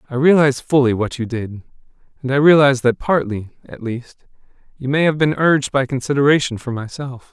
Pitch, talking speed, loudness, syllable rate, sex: 135 Hz, 180 wpm, -17 LUFS, 5.7 syllables/s, male